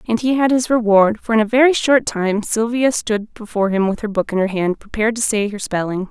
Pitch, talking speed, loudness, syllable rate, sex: 220 Hz, 255 wpm, -17 LUFS, 5.7 syllables/s, female